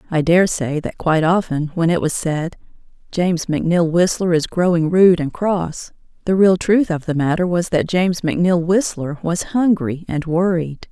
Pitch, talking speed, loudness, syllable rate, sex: 170 Hz, 180 wpm, -17 LUFS, 4.8 syllables/s, female